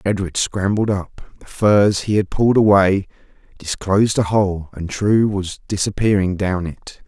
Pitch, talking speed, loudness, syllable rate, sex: 100 Hz, 155 wpm, -18 LUFS, 4.5 syllables/s, male